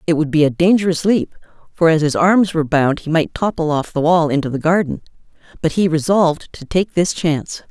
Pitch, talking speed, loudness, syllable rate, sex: 165 Hz, 220 wpm, -16 LUFS, 5.6 syllables/s, female